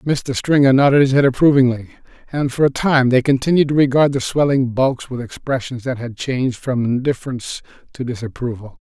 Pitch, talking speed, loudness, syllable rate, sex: 130 Hz, 175 wpm, -17 LUFS, 5.6 syllables/s, male